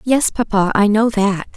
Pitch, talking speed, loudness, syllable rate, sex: 215 Hz, 190 wpm, -16 LUFS, 4.4 syllables/s, female